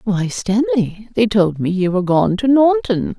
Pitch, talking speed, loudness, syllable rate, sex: 220 Hz, 190 wpm, -16 LUFS, 4.7 syllables/s, female